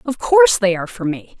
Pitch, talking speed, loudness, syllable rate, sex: 235 Hz, 255 wpm, -16 LUFS, 6.2 syllables/s, female